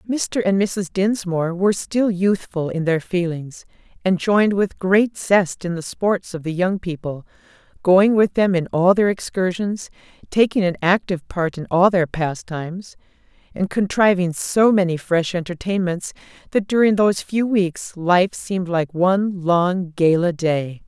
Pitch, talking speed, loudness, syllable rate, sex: 185 Hz, 160 wpm, -19 LUFS, 4.4 syllables/s, female